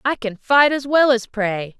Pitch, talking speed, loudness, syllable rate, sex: 245 Hz, 235 wpm, -17 LUFS, 4.1 syllables/s, female